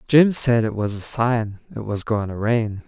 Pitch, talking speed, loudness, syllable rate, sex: 115 Hz, 230 wpm, -21 LUFS, 4.3 syllables/s, male